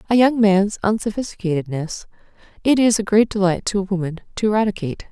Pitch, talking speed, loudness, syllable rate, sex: 200 Hz, 165 wpm, -19 LUFS, 6.5 syllables/s, female